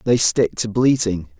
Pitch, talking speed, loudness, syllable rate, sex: 105 Hz, 175 wpm, -18 LUFS, 4.2 syllables/s, male